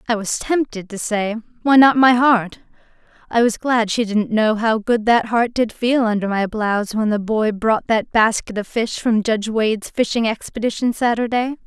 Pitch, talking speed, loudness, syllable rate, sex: 225 Hz, 195 wpm, -18 LUFS, 4.8 syllables/s, female